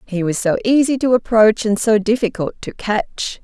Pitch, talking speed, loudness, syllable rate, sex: 220 Hz, 190 wpm, -17 LUFS, 4.8 syllables/s, female